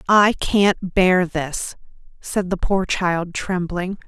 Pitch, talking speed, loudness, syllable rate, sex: 185 Hz, 130 wpm, -20 LUFS, 3.0 syllables/s, female